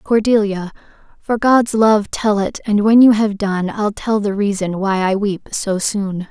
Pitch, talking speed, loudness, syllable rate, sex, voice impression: 205 Hz, 190 wpm, -16 LUFS, 4.1 syllables/s, female, feminine, slightly young, slightly adult-like, thin, tensed, powerful, bright, slightly hard, very clear, fluent, cute, intellectual, very refreshing, sincere, very calm, friendly, reassuring, slightly unique, elegant, sweet, slightly lively, kind